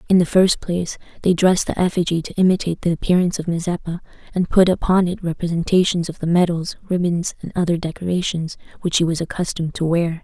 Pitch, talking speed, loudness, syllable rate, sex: 175 Hz, 190 wpm, -19 LUFS, 6.4 syllables/s, female